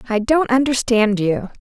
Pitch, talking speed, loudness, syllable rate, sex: 235 Hz, 150 wpm, -17 LUFS, 4.5 syllables/s, female